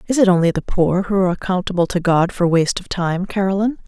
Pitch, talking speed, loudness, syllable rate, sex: 185 Hz, 230 wpm, -18 LUFS, 6.6 syllables/s, female